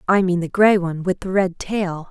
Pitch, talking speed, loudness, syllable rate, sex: 185 Hz, 255 wpm, -19 LUFS, 5.1 syllables/s, female